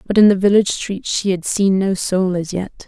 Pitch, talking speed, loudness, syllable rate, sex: 195 Hz, 250 wpm, -17 LUFS, 5.2 syllables/s, female